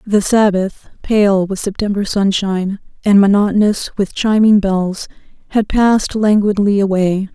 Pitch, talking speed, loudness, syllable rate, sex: 200 Hz, 125 wpm, -14 LUFS, 4.4 syllables/s, female